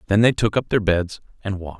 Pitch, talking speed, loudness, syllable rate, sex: 100 Hz, 270 wpm, -20 LUFS, 6.3 syllables/s, male